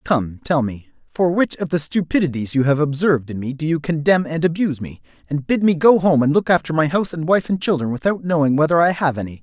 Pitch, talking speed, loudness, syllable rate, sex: 155 Hz, 250 wpm, -18 LUFS, 6.1 syllables/s, male